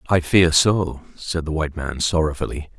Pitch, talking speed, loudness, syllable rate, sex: 80 Hz, 170 wpm, -20 LUFS, 5.0 syllables/s, male